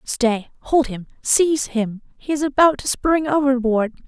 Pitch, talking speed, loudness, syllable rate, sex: 260 Hz, 120 wpm, -19 LUFS, 4.5 syllables/s, female